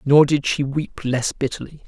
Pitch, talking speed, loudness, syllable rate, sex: 140 Hz, 190 wpm, -20 LUFS, 4.6 syllables/s, male